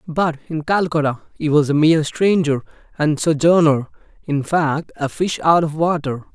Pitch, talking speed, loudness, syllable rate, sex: 155 Hz, 160 wpm, -18 LUFS, 4.6 syllables/s, male